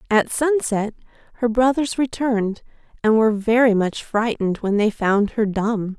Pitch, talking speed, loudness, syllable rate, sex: 225 Hz, 150 wpm, -20 LUFS, 4.7 syllables/s, female